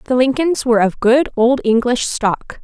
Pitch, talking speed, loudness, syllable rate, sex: 245 Hz, 180 wpm, -15 LUFS, 4.4 syllables/s, female